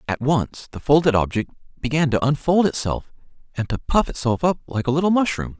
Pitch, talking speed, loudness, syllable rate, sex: 135 Hz, 195 wpm, -21 LUFS, 5.6 syllables/s, male